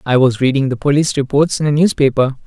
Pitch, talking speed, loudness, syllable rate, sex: 140 Hz, 220 wpm, -14 LUFS, 6.6 syllables/s, male